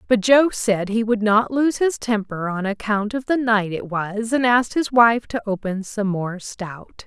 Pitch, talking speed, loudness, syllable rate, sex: 220 Hz, 210 wpm, -20 LUFS, 4.2 syllables/s, female